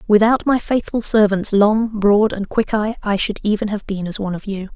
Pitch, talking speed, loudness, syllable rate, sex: 210 Hz, 215 wpm, -18 LUFS, 5.1 syllables/s, female